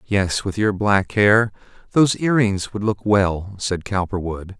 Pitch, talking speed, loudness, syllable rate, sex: 100 Hz, 170 wpm, -20 LUFS, 4.0 syllables/s, male